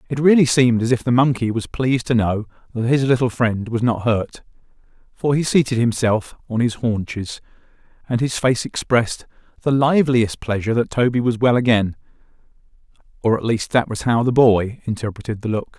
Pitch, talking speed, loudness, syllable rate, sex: 120 Hz, 180 wpm, -19 LUFS, 5.5 syllables/s, male